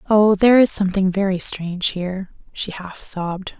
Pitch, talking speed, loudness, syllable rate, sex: 190 Hz, 165 wpm, -18 LUFS, 5.3 syllables/s, female